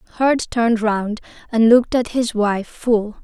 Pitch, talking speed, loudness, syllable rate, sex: 225 Hz, 165 wpm, -18 LUFS, 4.5 syllables/s, female